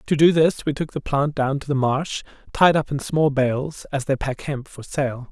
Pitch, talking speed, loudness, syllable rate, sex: 140 Hz, 250 wpm, -22 LUFS, 4.6 syllables/s, male